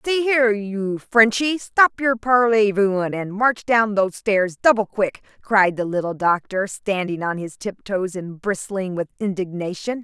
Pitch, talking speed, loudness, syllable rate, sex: 205 Hz, 160 wpm, -20 LUFS, 4.4 syllables/s, female